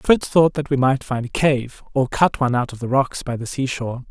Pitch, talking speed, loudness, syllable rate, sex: 130 Hz, 280 wpm, -20 LUFS, 5.5 syllables/s, male